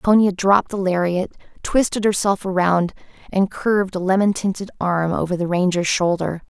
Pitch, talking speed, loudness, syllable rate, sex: 190 Hz, 155 wpm, -19 LUFS, 5.1 syllables/s, female